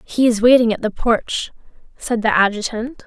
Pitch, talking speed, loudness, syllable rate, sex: 230 Hz, 175 wpm, -17 LUFS, 4.7 syllables/s, female